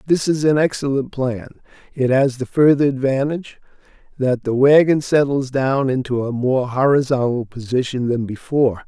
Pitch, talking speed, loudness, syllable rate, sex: 130 Hz, 150 wpm, -18 LUFS, 5.0 syllables/s, male